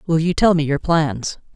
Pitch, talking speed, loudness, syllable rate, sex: 160 Hz, 230 wpm, -18 LUFS, 4.7 syllables/s, female